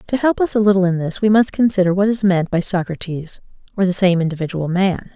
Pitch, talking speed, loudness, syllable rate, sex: 190 Hz, 235 wpm, -17 LUFS, 6.0 syllables/s, female